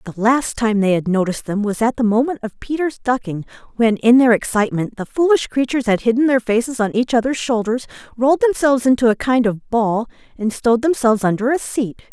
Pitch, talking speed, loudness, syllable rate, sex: 235 Hz, 210 wpm, -17 LUFS, 6.1 syllables/s, female